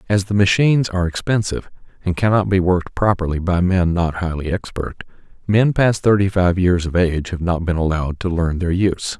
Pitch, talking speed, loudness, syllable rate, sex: 90 Hz, 195 wpm, -18 LUFS, 5.7 syllables/s, male